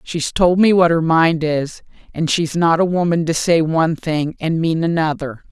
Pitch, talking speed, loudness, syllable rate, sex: 165 Hz, 205 wpm, -17 LUFS, 4.6 syllables/s, female